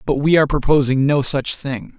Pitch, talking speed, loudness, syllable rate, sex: 140 Hz, 210 wpm, -17 LUFS, 5.3 syllables/s, male